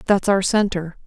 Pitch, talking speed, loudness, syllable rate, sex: 190 Hz, 170 wpm, -19 LUFS, 4.8 syllables/s, female